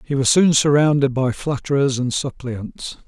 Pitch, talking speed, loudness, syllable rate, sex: 135 Hz, 155 wpm, -18 LUFS, 4.6 syllables/s, male